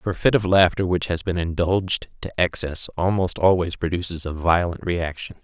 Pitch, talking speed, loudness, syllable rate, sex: 90 Hz, 190 wpm, -22 LUFS, 5.3 syllables/s, male